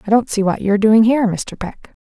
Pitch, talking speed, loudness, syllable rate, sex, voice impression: 215 Hz, 265 wpm, -15 LUFS, 6.1 syllables/s, female, feminine, adult-like, slightly soft, calm, slightly elegant